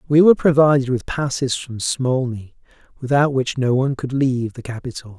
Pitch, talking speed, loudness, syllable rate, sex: 130 Hz, 175 wpm, -19 LUFS, 5.5 syllables/s, male